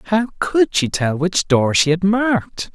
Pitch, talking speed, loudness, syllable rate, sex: 185 Hz, 195 wpm, -17 LUFS, 4.1 syllables/s, male